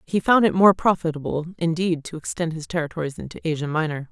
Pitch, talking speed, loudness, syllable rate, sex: 165 Hz, 190 wpm, -22 LUFS, 6.2 syllables/s, female